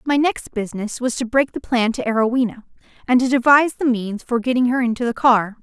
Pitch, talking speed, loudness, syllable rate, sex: 245 Hz, 225 wpm, -19 LUFS, 5.9 syllables/s, female